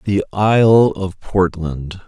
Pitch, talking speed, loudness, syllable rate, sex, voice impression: 95 Hz, 115 wpm, -16 LUFS, 3.3 syllables/s, male, masculine, middle-aged, thick, tensed, powerful, dark, clear, slightly raspy, intellectual, calm, mature, wild, lively, slightly kind